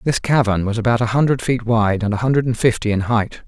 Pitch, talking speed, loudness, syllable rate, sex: 115 Hz, 260 wpm, -18 LUFS, 6.0 syllables/s, male